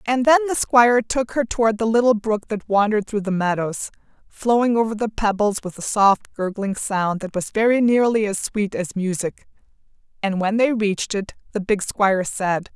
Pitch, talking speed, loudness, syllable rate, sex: 215 Hz, 195 wpm, -20 LUFS, 5.0 syllables/s, female